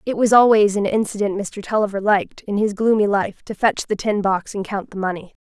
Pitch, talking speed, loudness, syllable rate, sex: 205 Hz, 230 wpm, -19 LUFS, 5.5 syllables/s, female